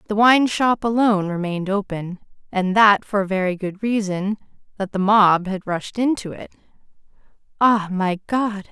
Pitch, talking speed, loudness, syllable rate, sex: 205 Hz, 150 wpm, -19 LUFS, 4.7 syllables/s, female